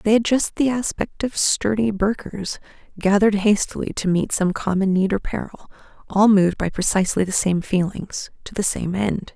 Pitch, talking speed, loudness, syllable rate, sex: 200 Hz, 180 wpm, -20 LUFS, 5.0 syllables/s, female